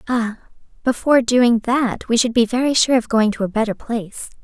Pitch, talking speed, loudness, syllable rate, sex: 235 Hz, 205 wpm, -18 LUFS, 5.4 syllables/s, female